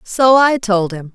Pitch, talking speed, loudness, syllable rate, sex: 220 Hz, 210 wpm, -14 LUFS, 3.8 syllables/s, female